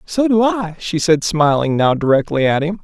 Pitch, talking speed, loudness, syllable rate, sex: 170 Hz, 210 wpm, -16 LUFS, 4.8 syllables/s, male